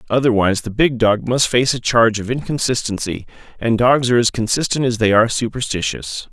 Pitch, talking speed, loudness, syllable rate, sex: 120 Hz, 180 wpm, -17 LUFS, 5.9 syllables/s, male